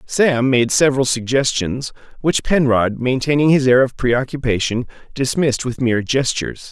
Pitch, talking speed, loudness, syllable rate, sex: 130 Hz, 115 wpm, -17 LUFS, 4.9 syllables/s, male